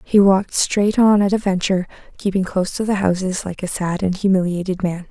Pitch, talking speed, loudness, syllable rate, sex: 190 Hz, 210 wpm, -18 LUFS, 5.8 syllables/s, female